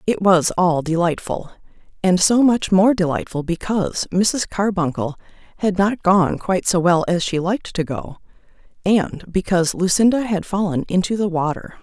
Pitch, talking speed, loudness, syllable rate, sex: 185 Hz, 150 wpm, -19 LUFS, 4.8 syllables/s, female